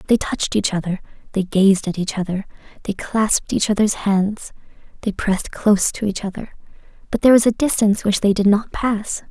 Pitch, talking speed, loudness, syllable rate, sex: 205 Hz, 195 wpm, -19 LUFS, 5.7 syllables/s, female